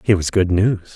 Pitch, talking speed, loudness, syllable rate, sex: 95 Hz, 250 wpm, -17 LUFS, 4.7 syllables/s, male